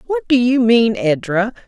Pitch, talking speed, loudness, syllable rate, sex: 235 Hz, 180 wpm, -15 LUFS, 4.1 syllables/s, female